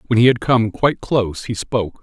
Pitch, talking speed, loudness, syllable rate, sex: 115 Hz, 240 wpm, -18 LUFS, 6.0 syllables/s, male